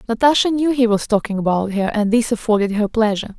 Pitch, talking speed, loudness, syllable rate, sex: 220 Hz, 215 wpm, -17 LUFS, 6.2 syllables/s, female